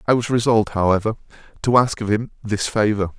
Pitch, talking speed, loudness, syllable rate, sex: 110 Hz, 190 wpm, -19 LUFS, 6.1 syllables/s, male